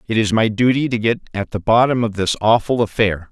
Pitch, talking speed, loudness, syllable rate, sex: 110 Hz, 235 wpm, -17 LUFS, 5.6 syllables/s, male